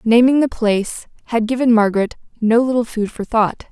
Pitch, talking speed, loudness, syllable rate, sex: 230 Hz, 180 wpm, -17 LUFS, 5.5 syllables/s, female